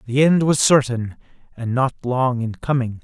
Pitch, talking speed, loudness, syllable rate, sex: 130 Hz, 180 wpm, -19 LUFS, 4.6 syllables/s, male